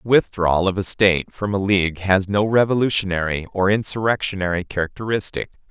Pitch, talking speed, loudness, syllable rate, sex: 100 Hz, 145 wpm, -20 LUFS, 5.9 syllables/s, male